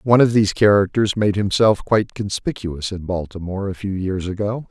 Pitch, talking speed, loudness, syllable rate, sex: 100 Hz, 180 wpm, -19 LUFS, 5.7 syllables/s, male